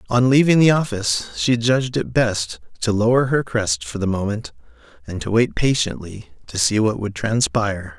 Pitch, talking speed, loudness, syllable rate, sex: 110 Hz, 180 wpm, -19 LUFS, 5.0 syllables/s, male